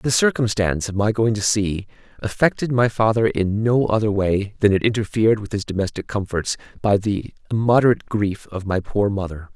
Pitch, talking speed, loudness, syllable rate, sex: 105 Hz, 180 wpm, -20 LUFS, 5.4 syllables/s, male